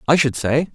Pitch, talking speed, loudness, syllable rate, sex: 140 Hz, 240 wpm, -18 LUFS, 5.3 syllables/s, male